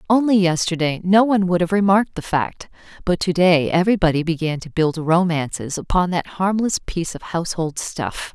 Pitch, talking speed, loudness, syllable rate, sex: 175 Hz, 175 wpm, -19 LUFS, 5.5 syllables/s, female